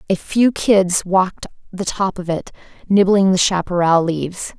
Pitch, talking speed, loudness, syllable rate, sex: 185 Hz, 155 wpm, -17 LUFS, 4.6 syllables/s, female